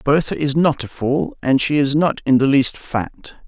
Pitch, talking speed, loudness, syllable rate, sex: 135 Hz, 225 wpm, -18 LUFS, 4.4 syllables/s, male